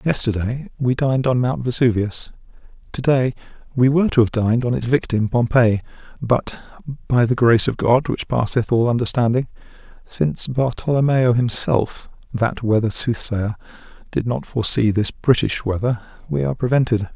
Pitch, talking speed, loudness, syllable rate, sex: 120 Hz, 145 wpm, -19 LUFS, 5.2 syllables/s, male